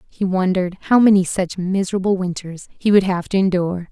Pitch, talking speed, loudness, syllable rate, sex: 185 Hz, 185 wpm, -18 LUFS, 5.8 syllables/s, female